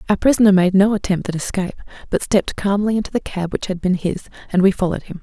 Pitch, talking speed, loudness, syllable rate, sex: 190 Hz, 240 wpm, -18 LUFS, 7.1 syllables/s, female